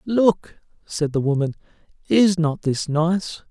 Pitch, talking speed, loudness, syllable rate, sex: 165 Hz, 135 wpm, -21 LUFS, 3.5 syllables/s, male